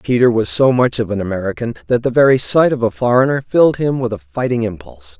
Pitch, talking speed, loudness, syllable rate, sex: 115 Hz, 230 wpm, -15 LUFS, 6.3 syllables/s, male